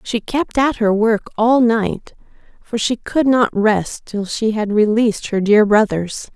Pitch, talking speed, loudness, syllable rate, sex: 220 Hz, 180 wpm, -16 LUFS, 3.9 syllables/s, female